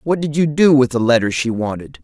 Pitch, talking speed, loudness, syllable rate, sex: 130 Hz, 265 wpm, -16 LUFS, 5.7 syllables/s, male